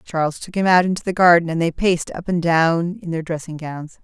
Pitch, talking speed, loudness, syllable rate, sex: 170 Hz, 255 wpm, -19 LUFS, 5.6 syllables/s, female